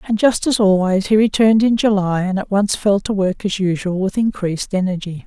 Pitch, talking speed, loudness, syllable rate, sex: 200 Hz, 215 wpm, -17 LUFS, 5.5 syllables/s, female